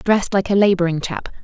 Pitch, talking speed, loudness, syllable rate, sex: 185 Hz, 210 wpm, -18 LUFS, 6.4 syllables/s, female